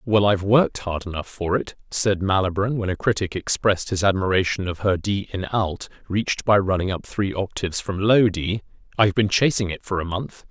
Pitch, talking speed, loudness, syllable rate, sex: 100 Hz, 205 wpm, -22 LUFS, 5.5 syllables/s, male